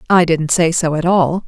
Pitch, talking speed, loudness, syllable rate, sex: 170 Hz, 245 wpm, -14 LUFS, 4.7 syllables/s, female